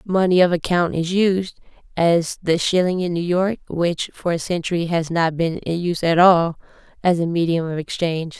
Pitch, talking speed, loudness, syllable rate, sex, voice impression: 170 Hz, 195 wpm, -19 LUFS, 5.0 syllables/s, female, feminine, adult-like, slightly weak, hard, halting, calm, slightly friendly, unique, modest